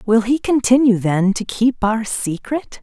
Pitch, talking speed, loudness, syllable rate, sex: 230 Hz, 170 wpm, -17 LUFS, 4.1 syllables/s, female